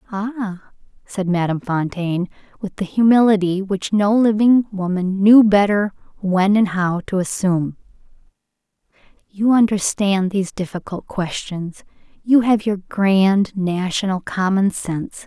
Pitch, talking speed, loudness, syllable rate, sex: 195 Hz, 115 wpm, -18 LUFS, 4.3 syllables/s, female